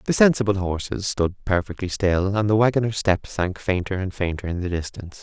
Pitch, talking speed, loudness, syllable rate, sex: 95 Hz, 185 wpm, -22 LUFS, 5.5 syllables/s, male